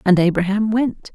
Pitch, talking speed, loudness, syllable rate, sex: 200 Hz, 155 wpm, -18 LUFS, 4.8 syllables/s, female